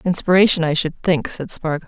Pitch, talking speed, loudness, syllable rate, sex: 170 Hz, 190 wpm, -18 LUFS, 5.5 syllables/s, female